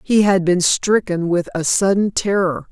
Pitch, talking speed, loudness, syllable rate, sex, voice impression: 185 Hz, 175 wpm, -17 LUFS, 4.3 syllables/s, female, very feminine, adult-like, slightly middle-aged, thin, tensed, powerful, slightly bright, slightly soft, clear, fluent, cool, very intellectual, refreshing, very sincere, calm, friendly, reassuring, slightly unique, elegant, wild, sweet, slightly strict, slightly intense